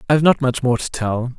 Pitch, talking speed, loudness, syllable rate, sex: 130 Hz, 305 wpm, -18 LUFS, 5.8 syllables/s, male